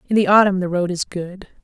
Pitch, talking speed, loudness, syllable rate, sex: 190 Hz, 255 wpm, -17 LUFS, 6.1 syllables/s, female